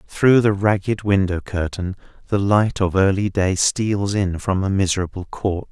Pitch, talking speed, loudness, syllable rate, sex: 95 Hz, 170 wpm, -19 LUFS, 4.5 syllables/s, male